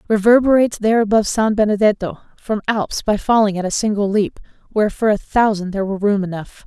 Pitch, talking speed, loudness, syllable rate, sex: 210 Hz, 190 wpm, -17 LUFS, 6.4 syllables/s, female